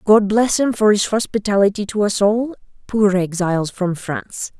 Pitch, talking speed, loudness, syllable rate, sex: 205 Hz, 170 wpm, -18 LUFS, 4.8 syllables/s, female